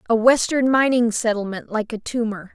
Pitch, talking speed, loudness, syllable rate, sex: 230 Hz, 165 wpm, -20 LUFS, 5.1 syllables/s, female